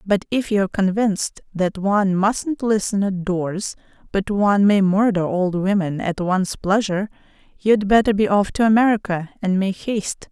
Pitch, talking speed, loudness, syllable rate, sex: 200 Hz, 170 wpm, -19 LUFS, 4.9 syllables/s, female